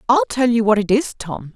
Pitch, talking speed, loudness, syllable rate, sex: 225 Hz, 270 wpm, -17 LUFS, 5.3 syllables/s, female